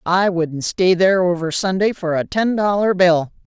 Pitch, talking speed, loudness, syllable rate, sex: 180 Hz, 185 wpm, -17 LUFS, 4.6 syllables/s, female